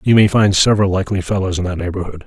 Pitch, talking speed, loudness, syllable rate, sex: 95 Hz, 240 wpm, -16 LUFS, 7.4 syllables/s, male